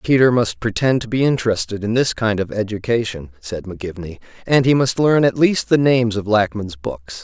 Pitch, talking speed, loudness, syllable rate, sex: 110 Hz, 200 wpm, -18 LUFS, 5.5 syllables/s, male